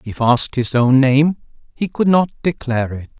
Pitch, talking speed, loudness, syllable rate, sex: 135 Hz, 190 wpm, -16 LUFS, 5.1 syllables/s, male